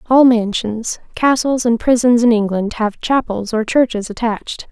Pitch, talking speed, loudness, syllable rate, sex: 230 Hz, 155 wpm, -16 LUFS, 4.6 syllables/s, female